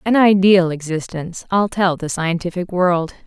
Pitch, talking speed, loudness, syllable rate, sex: 180 Hz, 145 wpm, -17 LUFS, 4.7 syllables/s, female